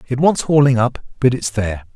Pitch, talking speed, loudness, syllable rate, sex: 125 Hz, 215 wpm, -17 LUFS, 5.6 syllables/s, male